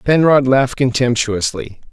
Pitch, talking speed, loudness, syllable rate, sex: 130 Hz, 95 wpm, -15 LUFS, 4.6 syllables/s, male